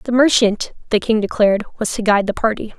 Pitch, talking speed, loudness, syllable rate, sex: 220 Hz, 215 wpm, -17 LUFS, 6.5 syllables/s, female